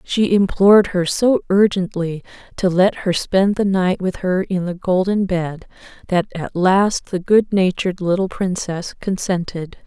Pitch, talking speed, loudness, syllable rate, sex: 185 Hz, 150 wpm, -18 LUFS, 4.2 syllables/s, female